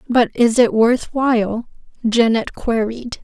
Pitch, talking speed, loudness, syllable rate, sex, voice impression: 235 Hz, 130 wpm, -17 LUFS, 3.8 syllables/s, female, feminine, slightly adult-like, sincere, slightly calm, slightly friendly, reassuring, slightly kind